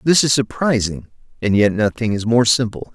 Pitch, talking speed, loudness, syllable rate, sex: 115 Hz, 185 wpm, -17 LUFS, 5.2 syllables/s, male